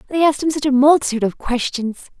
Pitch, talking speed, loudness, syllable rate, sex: 275 Hz, 220 wpm, -17 LUFS, 6.7 syllables/s, female